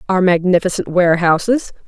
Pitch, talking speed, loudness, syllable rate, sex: 180 Hz, 95 wpm, -15 LUFS, 5.7 syllables/s, female